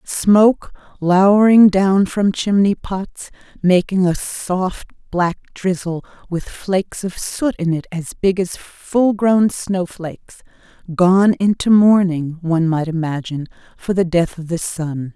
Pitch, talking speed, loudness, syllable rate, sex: 180 Hz, 135 wpm, -17 LUFS, 3.9 syllables/s, female